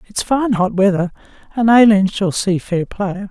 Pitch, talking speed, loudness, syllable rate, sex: 200 Hz, 180 wpm, -15 LUFS, 4.5 syllables/s, female